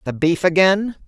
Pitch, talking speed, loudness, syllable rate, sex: 175 Hz, 165 wpm, -17 LUFS, 4.6 syllables/s, female